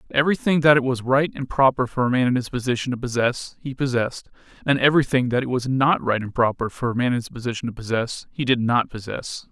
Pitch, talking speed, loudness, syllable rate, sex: 125 Hz, 240 wpm, -22 LUFS, 6.2 syllables/s, male